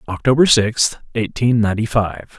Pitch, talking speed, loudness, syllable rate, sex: 115 Hz, 125 wpm, -17 LUFS, 4.6 syllables/s, male